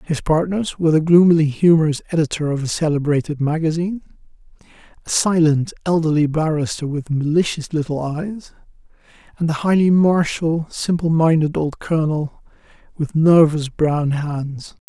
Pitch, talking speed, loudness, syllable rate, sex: 160 Hz, 125 wpm, -18 LUFS, 5.0 syllables/s, male